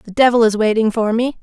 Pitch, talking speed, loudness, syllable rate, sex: 225 Hz, 250 wpm, -15 LUFS, 5.8 syllables/s, female